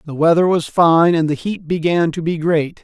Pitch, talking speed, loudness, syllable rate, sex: 165 Hz, 235 wpm, -16 LUFS, 4.8 syllables/s, male